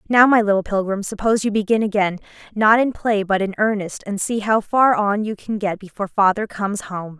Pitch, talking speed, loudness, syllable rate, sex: 205 Hz, 215 wpm, -19 LUFS, 5.6 syllables/s, female